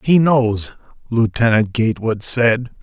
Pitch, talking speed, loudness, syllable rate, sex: 120 Hz, 105 wpm, -17 LUFS, 3.9 syllables/s, male